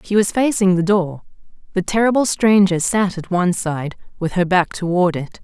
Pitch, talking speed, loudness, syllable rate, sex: 185 Hz, 190 wpm, -17 LUFS, 5.0 syllables/s, female